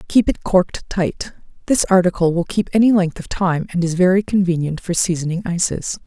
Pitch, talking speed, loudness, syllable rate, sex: 180 Hz, 190 wpm, -18 LUFS, 5.4 syllables/s, female